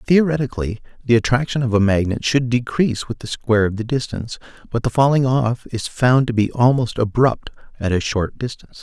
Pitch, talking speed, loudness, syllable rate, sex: 120 Hz, 190 wpm, -19 LUFS, 5.8 syllables/s, male